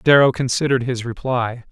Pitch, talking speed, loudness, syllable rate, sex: 125 Hz, 140 wpm, -19 LUFS, 5.7 syllables/s, male